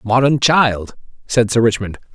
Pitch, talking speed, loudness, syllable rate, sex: 120 Hz, 140 wpm, -15 LUFS, 4.3 syllables/s, male